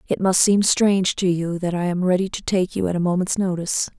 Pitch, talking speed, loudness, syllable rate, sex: 185 Hz, 255 wpm, -20 LUFS, 5.8 syllables/s, female